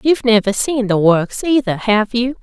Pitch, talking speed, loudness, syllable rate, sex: 230 Hz, 200 wpm, -15 LUFS, 4.8 syllables/s, female